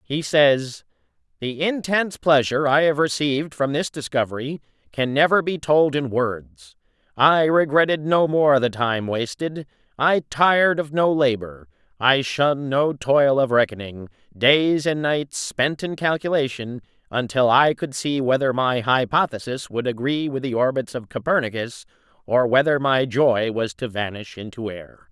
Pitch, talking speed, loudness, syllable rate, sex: 135 Hz, 150 wpm, -20 LUFS, 4.4 syllables/s, male